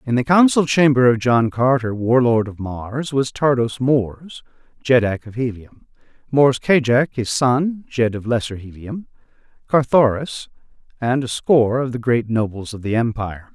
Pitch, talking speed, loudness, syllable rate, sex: 125 Hz, 155 wpm, -18 LUFS, 4.5 syllables/s, male